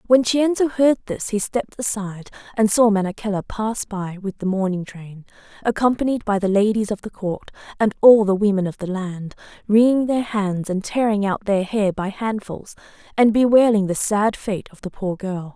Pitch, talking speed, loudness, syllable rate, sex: 205 Hz, 190 wpm, -20 LUFS, 5.0 syllables/s, female